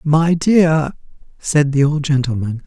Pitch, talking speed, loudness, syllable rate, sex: 150 Hz, 135 wpm, -16 LUFS, 3.8 syllables/s, male